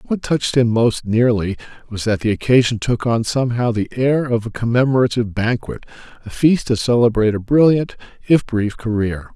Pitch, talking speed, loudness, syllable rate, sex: 120 Hz, 175 wpm, -17 LUFS, 5.3 syllables/s, male